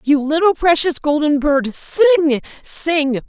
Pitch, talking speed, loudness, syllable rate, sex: 305 Hz, 130 wpm, -16 LUFS, 3.9 syllables/s, female